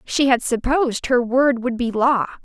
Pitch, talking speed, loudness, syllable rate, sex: 250 Hz, 195 wpm, -19 LUFS, 4.6 syllables/s, female